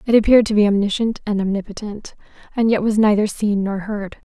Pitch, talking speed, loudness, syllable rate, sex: 210 Hz, 195 wpm, -18 LUFS, 6.0 syllables/s, female